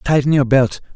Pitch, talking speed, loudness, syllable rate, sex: 135 Hz, 190 wpm, -15 LUFS, 5.4 syllables/s, male